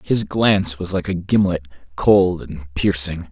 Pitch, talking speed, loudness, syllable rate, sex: 90 Hz, 165 wpm, -18 LUFS, 4.2 syllables/s, male